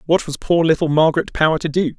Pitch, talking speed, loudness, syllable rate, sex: 160 Hz, 240 wpm, -17 LUFS, 6.5 syllables/s, male